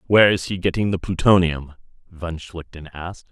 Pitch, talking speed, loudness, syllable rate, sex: 85 Hz, 145 wpm, -19 LUFS, 5.0 syllables/s, male